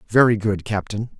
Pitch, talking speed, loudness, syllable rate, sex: 110 Hz, 150 wpm, -20 LUFS, 5.2 syllables/s, male